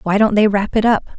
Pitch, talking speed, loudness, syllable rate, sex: 210 Hz, 305 wpm, -15 LUFS, 6.3 syllables/s, female